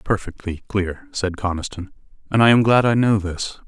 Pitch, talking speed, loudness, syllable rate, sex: 105 Hz, 180 wpm, -20 LUFS, 5.0 syllables/s, male